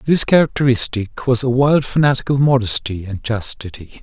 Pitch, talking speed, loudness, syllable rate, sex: 125 Hz, 135 wpm, -16 LUFS, 5.0 syllables/s, male